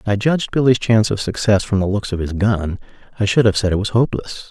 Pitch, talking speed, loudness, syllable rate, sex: 105 Hz, 265 wpm, -17 LUFS, 6.6 syllables/s, male